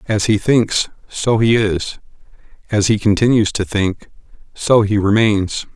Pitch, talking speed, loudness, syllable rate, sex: 105 Hz, 145 wpm, -16 LUFS, 4.0 syllables/s, male